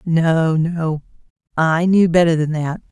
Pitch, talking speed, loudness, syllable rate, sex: 165 Hz, 145 wpm, -17 LUFS, 3.7 syllables/s, female